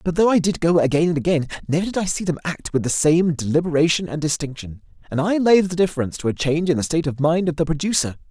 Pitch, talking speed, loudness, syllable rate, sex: 160 Hz, 260 wpm, -20 LUFS, 6.9 syllables/s, male